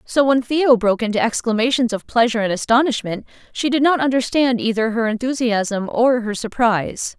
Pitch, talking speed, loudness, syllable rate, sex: 235 Hz, 165 wpm, -18 LUFS, 5.4 syllables/s, female